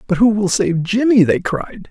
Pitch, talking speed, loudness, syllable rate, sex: 200 Hz, 220 wpm, -15 LUFS, 4.6 syllables/s, male